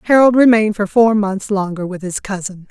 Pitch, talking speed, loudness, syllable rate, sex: 205 Hz, 200 wpm, -15 LUFS, 5.5 syllables/s, female